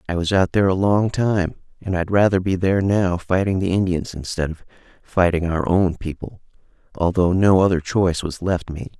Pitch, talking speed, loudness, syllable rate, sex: 90 Hz, 195 wpm, -20 LUFS, 5.3 syllables/s, male